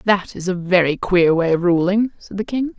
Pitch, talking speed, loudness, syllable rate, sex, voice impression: 190 Hz, 235 wpm, -18 LUFS, 5.0 syllables/s, female, feminine, slightly adult-like, slightly fluent, slightly sincere, slightly friendly, slightly sweet, slightly kind